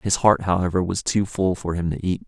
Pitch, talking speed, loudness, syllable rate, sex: 90 Hz, 265 wpm, -22 LUFS, 5.4 syllables/s, male